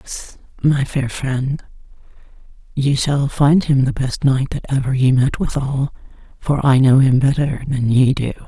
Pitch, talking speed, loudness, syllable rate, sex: 135 Hz, 170 wpm, -17 LUFS, 5.2 syllables/s, female